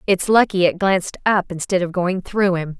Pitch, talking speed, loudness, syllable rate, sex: 185 Hz, 215 wpm, -18 LUFS, 5.1 syllables/s, female